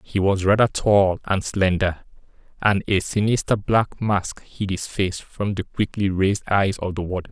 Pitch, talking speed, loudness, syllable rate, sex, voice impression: 100 Hz, 180 wpm, -21 LUFS, 4.5 syllables/s, male, very masculine, very adult-like, very thick, slightly relaxed, weak, slightly bright, soft, clear, slightly fluent, very cool, very intellectual, very sincere, very calm, very mature, friendly, very reassuring, very unique, very elegant, very wild